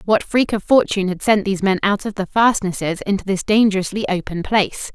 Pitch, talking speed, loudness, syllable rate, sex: 200 Hz, 205 wpm, -18 LUFS, 5.9 syllables/s, female